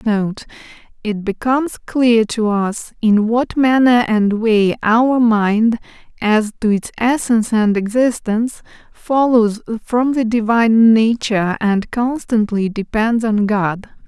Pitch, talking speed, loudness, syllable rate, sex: 225 Hz, 125 wpm, -16 LUFS, 3.8 syllables/s, female